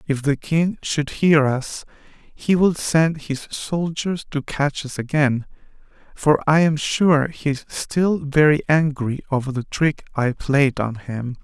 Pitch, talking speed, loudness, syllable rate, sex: 145 Hz, 165 wpm, -20 LUFS, 3.7 syllables/s, male